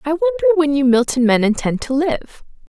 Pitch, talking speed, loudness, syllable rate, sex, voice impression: 260 Hz, 195 wpm, -16 LUFS, 5.9 syllables/s, female, feminine, adult-like, tensed, powerful, clear, fluent, intellectual, calm, reassuring, elegant, lively, slightly modest